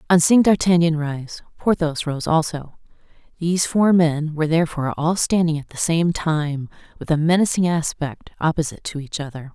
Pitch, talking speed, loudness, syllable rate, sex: 160 Hz, 165 wpm, -20 LUFS, 5.2 syllables/s, female